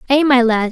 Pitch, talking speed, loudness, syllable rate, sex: 250 Hz, 250 wpm, -13 LUFS, 5.2 syllables/s, female